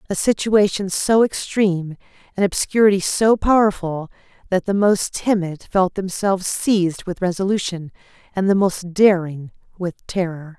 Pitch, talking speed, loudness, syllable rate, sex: 190 Hz, 130 wpm, -19 LUFS, 4.6 syllables/s, female